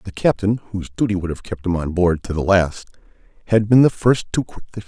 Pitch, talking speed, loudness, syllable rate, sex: 95 Hz, 260 wpm, -19 LUFS, 6.0 syllables/s, male